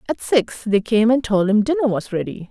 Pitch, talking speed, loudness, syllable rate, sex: 225 Hz, 240 wpm, -19 LUFS, 5.2 syllables/s, female